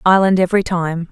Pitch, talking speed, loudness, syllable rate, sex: 180 Hz, 160 wpm, -15 LUFS, 5.9 syllables/s, female